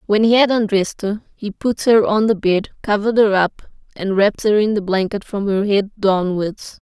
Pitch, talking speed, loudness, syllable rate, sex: 205 Hz, 210 wpm, -17 LUFS, 5.1 syllables/s, female